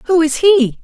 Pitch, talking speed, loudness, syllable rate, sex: 320 Hz, 215 wpm, -12 LUFS, 4.0 syllables/s, female